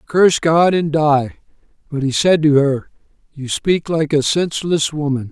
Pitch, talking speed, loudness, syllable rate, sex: 150 Hz, 170 wpm, -16 LUFS, 4.5 syllables/s, male